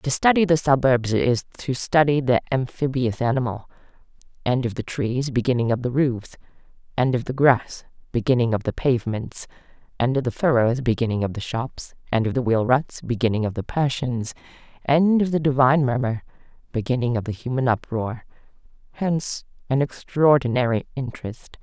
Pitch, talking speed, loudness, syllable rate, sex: 125 Hz, 160 wpm, -22 LUFS, 5.2 syllables/s, female